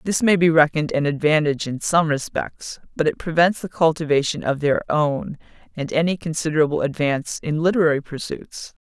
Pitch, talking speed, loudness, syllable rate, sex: 155 Hz, 165 wpm, -20 LUFS, 5.6 syllables/s, female